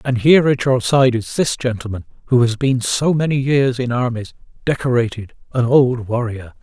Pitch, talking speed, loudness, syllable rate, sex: 125 Hz, 170 wpm, -17 LUFS, 5.0 syllables/s, male